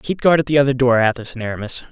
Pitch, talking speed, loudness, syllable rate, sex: 130 Hz, 280 wpm, -17 LUFS, 7.1 syllables/s, male